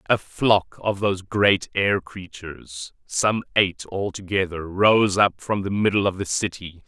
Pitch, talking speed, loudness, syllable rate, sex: 95 Hz, 155 wpm, -22 LUFS, 4.2 syllables/s, male